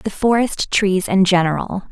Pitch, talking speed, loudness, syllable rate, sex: 190 Hz, 155 wpm, -17 LUFS, 4.3 syllables/s, female